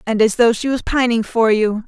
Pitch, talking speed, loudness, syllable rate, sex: 230 Hz, 255 wpm, -16 LUFS, 5.2 syllables/s, female